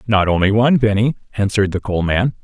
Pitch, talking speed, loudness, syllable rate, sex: 105 Hz, 195 wpm, -16 LUFS, 6.4 syllables/s, male